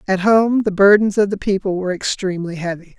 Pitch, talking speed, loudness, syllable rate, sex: 195 Hz, 200 wpm, -17 LUFS, 6.0 syllables/s, female